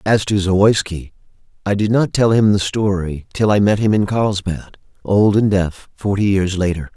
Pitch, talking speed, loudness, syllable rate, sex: 100 Hz, 190 wpm, -16 LUFS, 4.7 syllables/s, male